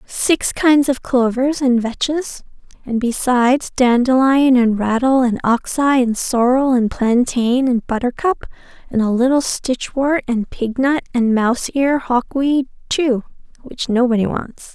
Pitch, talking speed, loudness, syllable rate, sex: 250 Hz, 135 wpm, -17 LUFS, 4.0 syllables/s, female